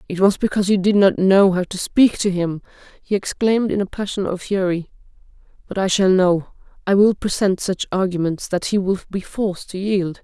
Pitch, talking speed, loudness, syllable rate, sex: 190 Hz, 200 wpm, -19 LUFS, 5.3 syllables/s, female